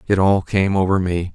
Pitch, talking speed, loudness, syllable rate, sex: 90 Hz, 225 wpm, -18 LUFS, 5.0 syllables/s, male